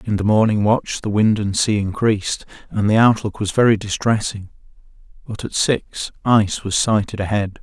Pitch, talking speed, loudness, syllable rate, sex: 105 Hz, 175 wpm, -18 LUFS, 5.0 syllables/s, male